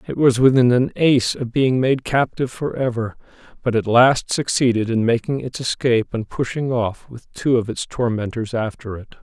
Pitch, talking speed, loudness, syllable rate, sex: 120 Hz, 190 wpm, -19 LUFS, 5.0 syllables/s, male